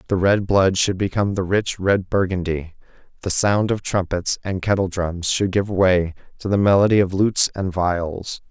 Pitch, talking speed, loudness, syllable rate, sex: 95 Hz, 175 wpm, -20 LUFS, 4.7 syllables/s, male